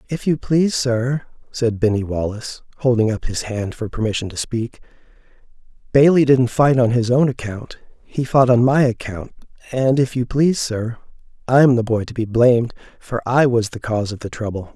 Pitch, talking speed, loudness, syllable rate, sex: 120 Hz, 190 wpm, -18 LUFS, 5.3 syllables/s, male